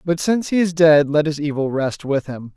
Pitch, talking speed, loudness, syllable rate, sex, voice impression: 155 Hz, 260 wpm, -18 LUFS, 5.3 syllables/s, male, masculine, adult-like, tensed, slightly powerful, slightly bright, clear, sincere, calm, friendly, reassuring, wild, kind